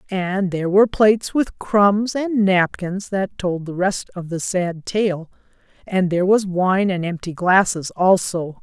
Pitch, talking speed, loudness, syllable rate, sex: 190 Hz, 160 wpm, -19 LUFS, 4.2 syllables/s, female